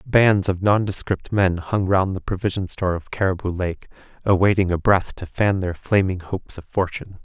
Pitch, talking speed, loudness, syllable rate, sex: 95 Hz, 180 wpm, -21 LUFS, 5.2 syllables/s, male